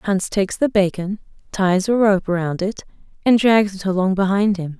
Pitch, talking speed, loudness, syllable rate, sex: 195 Hz, 190 wpm, -18 LUFS, 4.8 syllables/s, female